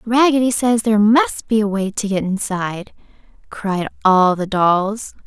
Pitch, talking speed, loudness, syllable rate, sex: 210 Hz, 160 wpm, -17 LUFS, 4.4 syllables/s, female